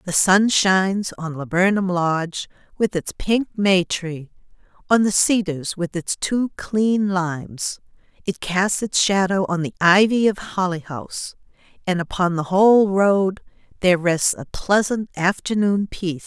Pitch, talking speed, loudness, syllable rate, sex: 185 Hz, 150 wpm, -20 LUFS, 4.2 syllables/s, female